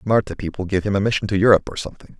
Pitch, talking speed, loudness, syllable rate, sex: 100 Hz, 275 wpm, -20 LUFS, 8.2 syllables/s, male